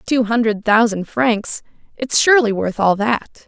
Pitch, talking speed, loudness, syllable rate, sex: 225 Hz, 140 wpm, -16 LUFS, 4.3 syllables/s, female